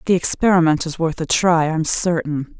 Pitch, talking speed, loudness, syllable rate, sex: 165 Hz, 185 wpm, -17 LUFS, 4.9 syllables/s, female